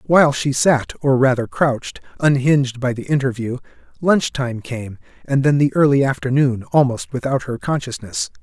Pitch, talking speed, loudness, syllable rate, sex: 130 Hz, 155 wpm, -18 LUFS, 5.0 syllables/s, male